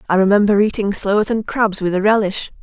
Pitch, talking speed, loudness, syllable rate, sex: 205 Hz, 205 wpm, -16 LUFS, 5.5 syllables/s, female